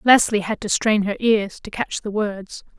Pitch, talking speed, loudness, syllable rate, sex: 210 Hz, 215 wpm, -20 LUFS, 4.4 syllables/s, female